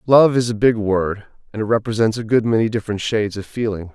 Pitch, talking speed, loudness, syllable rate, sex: 110 Hz, 230 wpm, -19 LUFS, 6.2 syllables/s, male